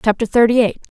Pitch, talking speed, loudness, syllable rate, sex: 225 Hz, 180 wpm, -15 LUFS, 6.6 syllables/s, female